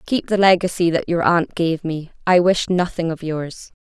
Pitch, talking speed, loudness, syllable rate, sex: 175 Hz, 205 wpm, -19 LUFS, 4.6 syllables/s, female